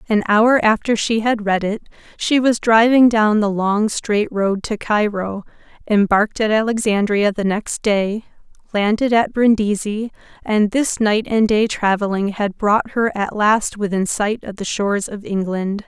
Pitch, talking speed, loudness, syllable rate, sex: 210 Hz, 165 wpm, -17 LUFS, 4.3 syllables/s, female